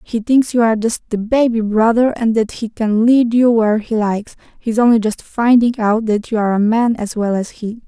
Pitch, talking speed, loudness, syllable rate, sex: 225 Hz, 235 wpm, -15 LUFS, 5.2 syllables/s, female